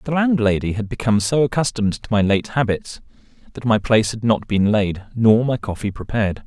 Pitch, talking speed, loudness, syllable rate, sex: 110 Hz, 195 wpm, -19 LUFS, 5.8 syllables/s, male